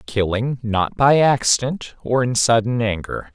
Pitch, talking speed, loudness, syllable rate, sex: 120 Hz, 145 wpm, -18 LUFS, 4.2 syllables/s, male